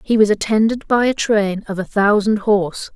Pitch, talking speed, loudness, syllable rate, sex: 210 Hz, 205 wpm, -17 LUFS, 5.0 syllables/s, female